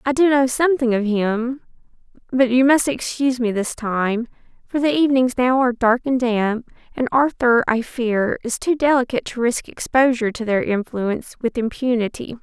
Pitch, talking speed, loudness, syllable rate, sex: 245 Hz, 170 wpm, -19 LUFS, 5.1 syllables/s, female